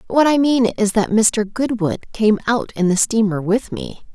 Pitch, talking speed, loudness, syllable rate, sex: 220 Hz, 205 wpm, -17 LUFS, 4.4 syllables/s, female